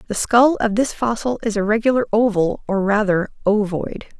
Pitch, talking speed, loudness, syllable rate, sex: 215 Hz, 170 wpm, -18 LUFS, 5.0 syllables/s, female